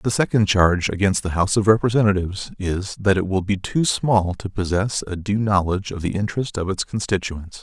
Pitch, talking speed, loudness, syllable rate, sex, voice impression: 100 Hz, 205 wpm, -21 LUFS, 5.6 syllables/s, male, very masculine, very adult-like, very middle-aged, very thick, slightly relaxed, powerful, slightly dark, soft, slightly muffled, fluent, very cool, intellectual, very sincere, very calm, very mature, very friendly, very reassuring, very unique, very elegant, wild, sweet, very kind, slightly modest